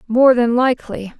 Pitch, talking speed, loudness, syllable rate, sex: 240 Hz, 150 wpm, -15 LUFS, 5.0 syllables/s, female